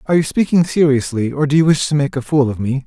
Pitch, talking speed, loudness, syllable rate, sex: 145 Hz, 295 wpm, -16 LUFS, 6.6 syllables/s, male